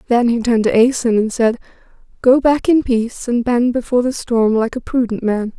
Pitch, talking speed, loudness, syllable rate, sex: 240 Hz, 215 wpm, -16 LUFS, 5.5 syllables/s, female